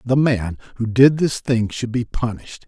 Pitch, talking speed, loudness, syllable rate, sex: 120 Hz, 200 wpm, -19 LUFS, 4.6 syllables/s, male